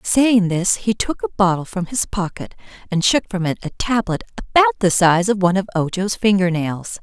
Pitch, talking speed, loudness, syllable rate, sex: 195 Hz, 205 wpm, -18 LUFS, 5.0 syllables/s, female